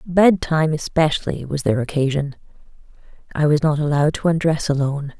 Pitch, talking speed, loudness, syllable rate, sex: 150 Hz, 150 wpm, -19 LUFS, 5.6 syllables/s, female